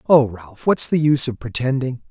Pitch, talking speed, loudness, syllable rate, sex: 130 Hz, 200 wpm, -19 LUFS, 5.3 syllables/s, male